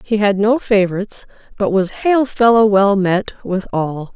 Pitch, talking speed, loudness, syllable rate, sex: 205 Hz, 175 wpm, -15 LUFS, 4.5 syllables/s, female